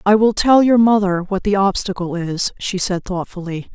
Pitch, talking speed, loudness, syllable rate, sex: 195 Hz, 190 wpm, -17 LUFS, 4.8 syllables/s, female